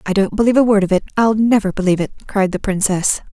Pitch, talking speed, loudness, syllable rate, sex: 205 Hz, 235 wpm, -16 LUFS, 7.0 syllables/s, female